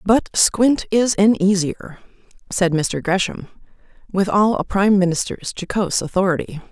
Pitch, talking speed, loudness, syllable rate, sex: 195 Hz, 135 wpm, -18 LUFS, 4.7 syllables/s, female